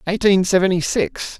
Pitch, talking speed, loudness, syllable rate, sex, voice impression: 175 Hz, 130 wpm, -17 LUFS, 4.8 syllables/s, male, very masculine, slightly middle-aged, slightly thick, tensed, powerful, very bright, slightly hard, very clear, very fluent, cool, slightly intellectual, very refreshing, slightly calm, slightly mature, friendly, reassuring, very unique, slightly elegant, wild, sweet, very lively, kind, intense, slightly light